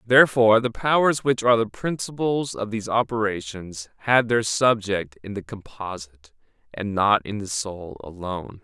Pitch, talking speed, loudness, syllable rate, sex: 105 Hz, 155 wpm, -22 LUFS, 4.9 syllables/s, male